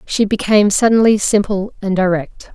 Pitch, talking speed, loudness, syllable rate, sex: 200 Hz, 140 wpm, -14 LUFS, 5.1 syllables/s, female